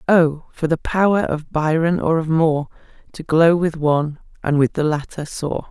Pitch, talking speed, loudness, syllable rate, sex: 160 Hz, 190 wpm, -19 LUFS, 4.8 syllables/s, female